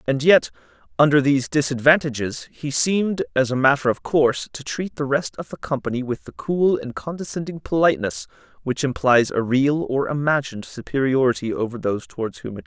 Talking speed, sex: 185 wpm, male